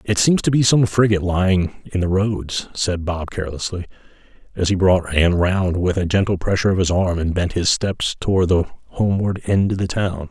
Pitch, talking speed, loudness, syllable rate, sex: 95 Hz, 210 wpm, -19 LUFS, 5.5 syllables/s, male